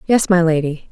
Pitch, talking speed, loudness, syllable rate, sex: 175 Hz, 195 wpm, -15 LUFS, 5.1 syllables/s, female